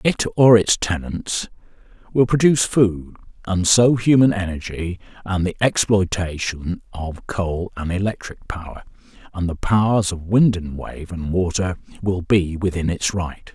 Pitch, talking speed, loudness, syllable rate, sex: 95 Hz, 145 wpm, -20 LUFS, 4.2 syllables/s, male